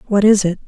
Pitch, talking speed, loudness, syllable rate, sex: 200 Hz, 270 wpm, -14 LUFS, 6.7 syllables/s, female